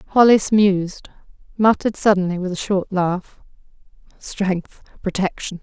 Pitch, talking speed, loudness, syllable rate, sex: 195 Hz, 105 wpm, -19 LUFS, 4.4 syllables/s, female